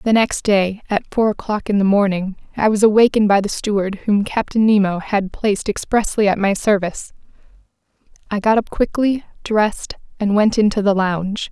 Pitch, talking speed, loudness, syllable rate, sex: 205 Hz, 175 wpm, -17 LUFS, 5.4 syllables/s, female